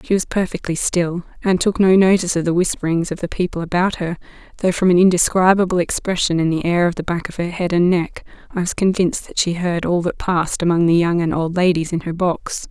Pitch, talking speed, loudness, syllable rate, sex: 175 Hz, 235 wpm, -18 LUFS, 5.9 syllables/s, female